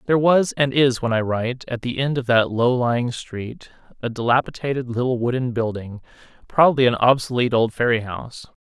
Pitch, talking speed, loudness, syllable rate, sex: 125 Hz, 180 wpm, -20 LUFS, 5.7 syllables/s, male